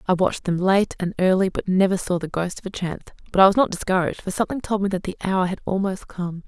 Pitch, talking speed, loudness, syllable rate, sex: 190 Hz, 270 wpm, -22 LUFS, 6.7 syllables/s, female